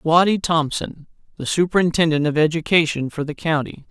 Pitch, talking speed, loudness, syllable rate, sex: 160 Hz, 140 wpm, -19 LUFS, 5.4 syllables/s, male